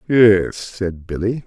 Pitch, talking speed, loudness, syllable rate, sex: 105 Hz, 125 wpm, -18 LUFS, 3.1 syllables/s, male